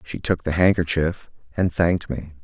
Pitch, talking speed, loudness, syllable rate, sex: 85 Hz, 170 wpm, -22 LUFS, 5.0 syllables/s, male